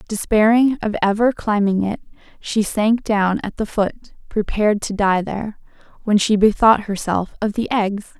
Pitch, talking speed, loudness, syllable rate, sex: 210 Hz, 160 wpm, -18 LUFS, 4.7 syllables/s, female